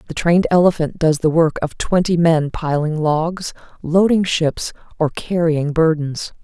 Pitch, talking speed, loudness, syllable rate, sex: 160 Hz, 150 wpm, -17 LUFS, 4.3 syllables/s, female